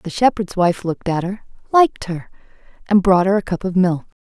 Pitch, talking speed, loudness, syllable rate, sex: 190 Hz, 210 wpm, -18 LUFS, 5.5 syllables/s, female